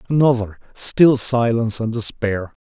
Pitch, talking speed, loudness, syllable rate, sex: 115 Hz, 90 wpm, -18 LUFS, 4.5 syllables/s, male